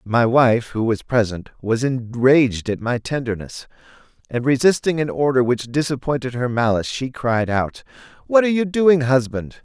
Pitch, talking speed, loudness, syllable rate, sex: 130 Hz, 160 wpm, -19 LUFS, 4.8 syllables/s, male